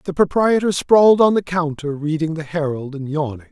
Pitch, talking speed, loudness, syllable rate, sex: 165 Hz, 190 wpm, -18 LUFS, 5.4 syllables/s, male